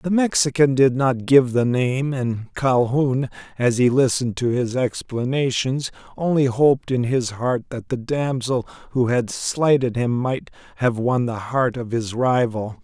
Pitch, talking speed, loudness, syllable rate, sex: 125 Hz, 165 wpm, -20 LUFS, 4.1 syllables/s, male